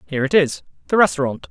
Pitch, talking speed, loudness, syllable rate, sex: 155 Hz, 160 wpm, -18 LUFS, 7.4 syllables/s, male